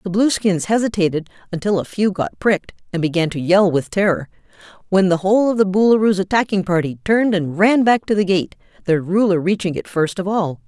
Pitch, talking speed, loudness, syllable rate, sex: 190 Hz, 200 wpm, -18 LUFS, 5.8 syllables/s, female